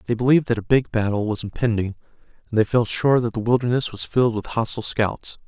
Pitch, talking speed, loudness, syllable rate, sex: 115 Hz, 220 wpm, -21 LUFS, 6.4 syllables/s, male